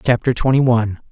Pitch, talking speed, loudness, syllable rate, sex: 120 Hz, 160 wpm, -16 LUFS, 6.6 syllables/s, male